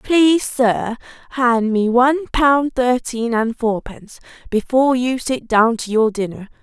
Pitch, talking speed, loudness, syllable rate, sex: 240 Hz, 155 wpm, -17 LUFS, 4.2 syllables/s, female